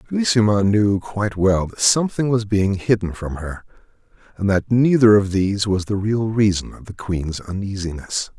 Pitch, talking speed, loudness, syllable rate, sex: 100 Hz, 165 wpm, -19 LUFS, 5.0 syllables/s, male